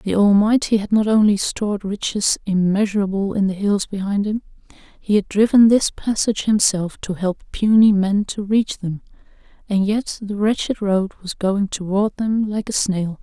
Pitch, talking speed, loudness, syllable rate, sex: 205 Hz, 170 wpm, -19 LUFS, 4.6 syllables/s, female